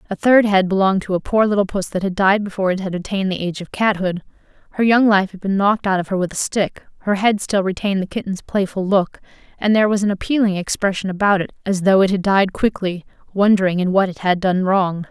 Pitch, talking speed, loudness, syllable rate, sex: 195 Hz, 240 wpm, -18 LUFS, 6.3 syllables/s, female